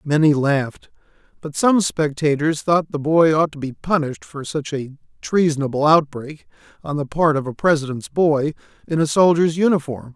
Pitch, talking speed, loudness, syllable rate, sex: 150 Hz, 165 wpm, -19 LUFS, 5.0 syllables/s, male